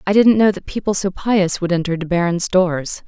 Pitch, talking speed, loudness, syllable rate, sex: 185 Hz, 235 wpm, -17 LUFS, 5.1 syllables/s, female